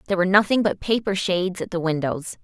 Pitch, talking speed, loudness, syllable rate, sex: 185 Hz, 220 wpm, -22 LUFS, 6.7 syllables/s, female